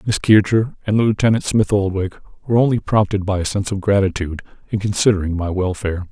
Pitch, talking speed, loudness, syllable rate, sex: 100 Hz, 175 wpm, -18 LUFS, 6.1 syllables/s, male